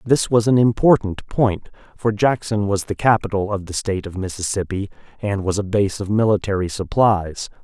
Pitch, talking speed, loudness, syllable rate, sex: 105 Hz, 175 wpm, -20 LUFS, 5.1 syllables/s, male